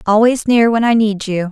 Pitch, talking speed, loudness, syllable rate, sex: 220 Hz, 240 wpm, -13 LUFS, 5.1 syllables/s, female